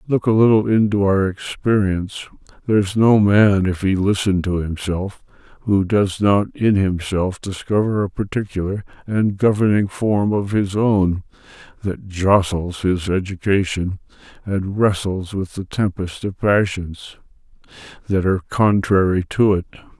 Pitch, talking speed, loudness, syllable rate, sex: 100 Hz, 135 wpm, -19 LUFS, 4.3 syllables/s, male